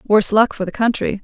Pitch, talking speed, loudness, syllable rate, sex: 215 Hz, 245 wpm, -17 LUFS, 5.9 syllables/s, female